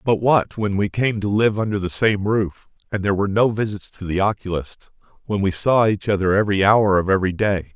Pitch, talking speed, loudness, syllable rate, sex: 100 Hz, 225 wpm, -20 LUFS, 5.7 syllables/s, male